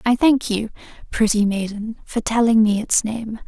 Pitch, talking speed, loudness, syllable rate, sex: 220 Hz, 175 wpm, -19 LUFS, 4.5 syllables/s, female